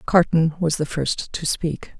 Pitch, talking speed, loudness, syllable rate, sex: 160 Hz, 180 wpm, -22 LUFS, 3.9 syllables/s, female